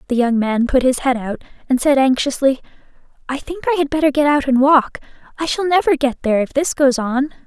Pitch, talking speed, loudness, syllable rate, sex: 270 Hz, 225 wpm, -17 LUFS, 5.8 syllables/s, female